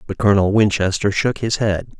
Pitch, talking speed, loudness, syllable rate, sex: 100 Hz, 180 wpm, -17 LUFS, 5.5 syllables/s, male